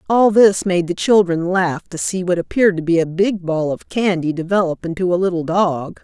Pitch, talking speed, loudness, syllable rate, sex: 180 Hz, 220 wpm, -17 LUFS, 5.2 syllables/s, female